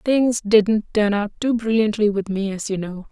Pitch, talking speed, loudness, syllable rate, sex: 210 Hz, 210 wpm, -20 LUFS, 4.5 syllables/s, female